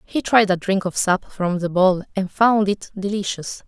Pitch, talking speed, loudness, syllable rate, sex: 195 Hz, 210 wpm, -20 LUFS, 4.4 syllables/s, female